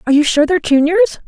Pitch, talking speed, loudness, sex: 325 Hz, 235 wpm, -13 LUFS, female